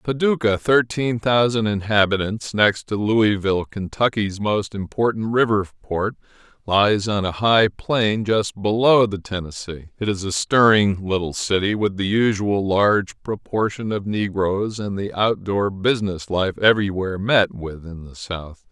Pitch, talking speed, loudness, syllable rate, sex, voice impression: 105 Hz, 145 wpm, -20 LUFS, 4.1 syllables/s, male, masculine, middle-aged, thick, tensed, slightly powerful, clear, slightly halting, slightly cool, slightly mature, friendly, wild, lively, intense, sharp